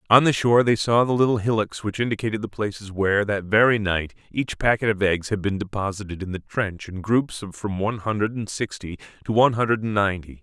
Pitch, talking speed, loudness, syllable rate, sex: 105 Hz, 225 wpm, -22 LUFS, 6.0 syllables/s, male